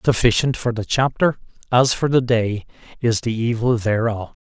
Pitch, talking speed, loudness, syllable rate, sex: 115 Hz, 160 wpm, -19 LUFS, 4.8 syllables/s, male